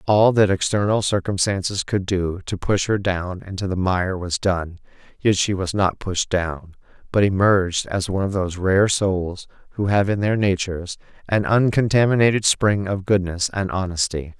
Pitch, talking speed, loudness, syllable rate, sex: 95 Hz, 170 wpm, -20 LUFS, 4.8 syllables/s, male